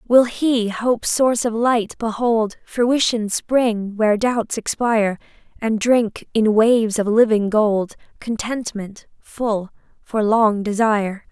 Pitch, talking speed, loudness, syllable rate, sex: 220 Hz, 125 wpm, -19 LUFS, 3.7 syllables/s, female